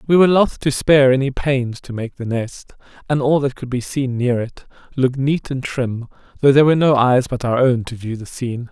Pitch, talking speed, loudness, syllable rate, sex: 130 Hz, 240 wpm, -18 LUFS, 5.4 syllables/s, male